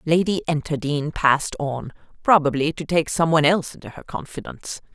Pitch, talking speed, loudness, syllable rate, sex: 155 Hz, 160 wpm, -21 LUFS, 5.7 syllables/s, female